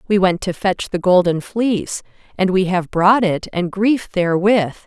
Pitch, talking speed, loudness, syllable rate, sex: 190 Hz, 185 wpm, -17 LUFS, 4.6 syllables/s, female